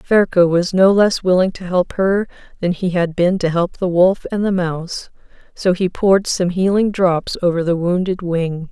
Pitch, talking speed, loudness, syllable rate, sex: 180 Hz, 200 wpm, -17 LUFS, 4.6 syllables/s, female